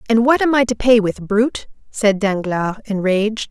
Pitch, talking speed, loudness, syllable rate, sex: 215 Hz, 190 wpm, -17 LUFS, 5.0 syllables/s, female